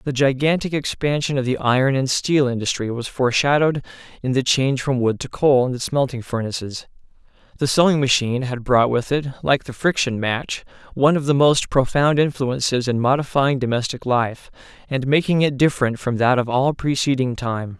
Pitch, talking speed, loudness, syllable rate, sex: 130 Hz, 180 wpm, -20 LUFS, 5.4 syllables/s, male